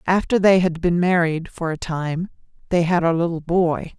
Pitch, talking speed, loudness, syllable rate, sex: 170 Hz, 195 wpm, -20 LUFS, 4.6 syllables/s, female